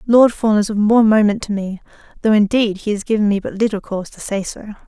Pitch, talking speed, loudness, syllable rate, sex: 210 Hz, 235 wpm, -17 LUFS, 6.1 syllables/s, female